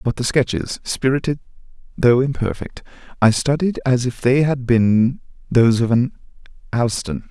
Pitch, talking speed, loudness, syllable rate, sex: 125 Hz, 140 wpm, -18 LUFS, 4.7 syllables/s, male